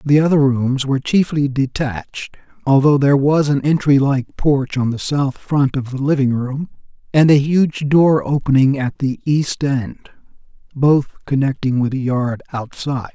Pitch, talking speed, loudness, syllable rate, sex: 135 Hz, 165 wpm, -17 LUFS, 4.5 syllables/s, male